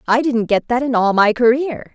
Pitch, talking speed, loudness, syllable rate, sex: 240 Hz, 245 wpm, -16 LUFS, 5.0 syllables/s, female